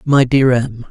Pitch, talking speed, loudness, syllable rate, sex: 125 Hz, 200 wpm, -14 LUFS, 3.8 syllables/s, male